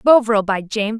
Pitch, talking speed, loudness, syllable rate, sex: 220 Hz, 180 wpm, -17 LUFS, 5.4 syllables/s, female